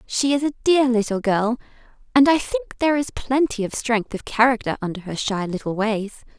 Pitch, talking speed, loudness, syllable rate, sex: 230 Hz, 195 wpm, -21 LUFS, 5.3 syllables/s, female